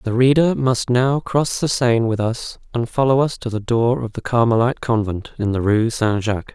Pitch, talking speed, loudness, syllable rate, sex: 120 Hz, 220 wpm, -19 LUFS, 5.1 syllables/s, male